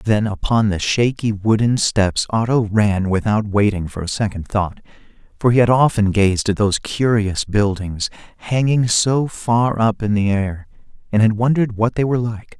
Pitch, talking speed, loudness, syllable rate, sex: 110 Hz, 175 wpm, -18 LUFS, 4.6 syllables/s, male